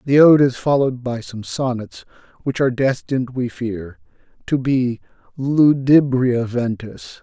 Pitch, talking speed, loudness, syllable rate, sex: 125 Hz, 135 wpm, -18 LUFS, 4.4 syllables/s, male